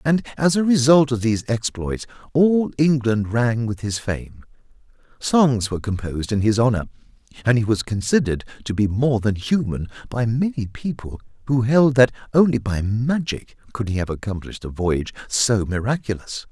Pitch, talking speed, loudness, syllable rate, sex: 120 Hz, 165 wpm, -21 LUFS, 5.1 syllables/s, male